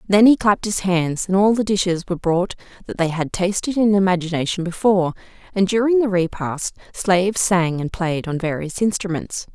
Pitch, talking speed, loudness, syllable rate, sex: 185 Hz, 180 wpm, -19 LUFS, 5.4 syllables/s, female